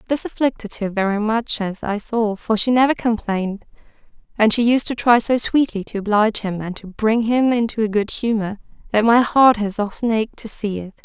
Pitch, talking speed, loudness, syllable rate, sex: 220 Hz, 210 wpm, -19 LUFS, 5.2 syllables/s, female